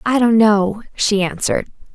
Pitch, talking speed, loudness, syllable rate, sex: 210 Hz, 155 wpm, -16 LUFS, 4.6 syllables/s, female